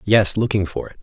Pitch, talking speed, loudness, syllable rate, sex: 100 Hz, 235 wpm, -19 LUFS, 5.6 syllables/s, male